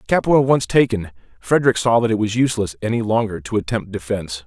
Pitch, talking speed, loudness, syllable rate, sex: 110 Hz, 190 wpm, -19 LUFS, 6.3 syllables/s, male